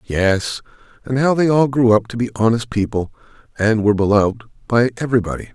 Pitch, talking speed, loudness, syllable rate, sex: 115 Hz, 175 wpm, -17 LUFS, 6.1 syllables/s, male